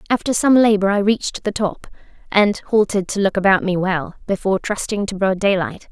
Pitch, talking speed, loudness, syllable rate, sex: 200 Hz, 195 wpm, -18 LUFS, 5.4 syllables/s, female